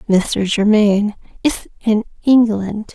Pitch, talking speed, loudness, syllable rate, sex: 215 Hz, 100 wpm, -16 LUFS, 3.9 syllables/s, female